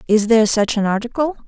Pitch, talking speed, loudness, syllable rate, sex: 225 Hz, 205 wpm, -17 LUFS, 6.5 syllables/s, female